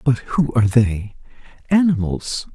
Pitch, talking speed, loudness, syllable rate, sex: 120 Hz, 95 wpm, -19 LUFS, 4.4 syllables/s, male